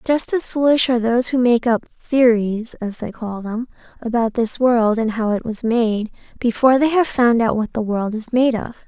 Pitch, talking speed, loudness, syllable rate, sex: 235 Hz, 215 wpm, -18 LUFS, 4.8 syllables/s, female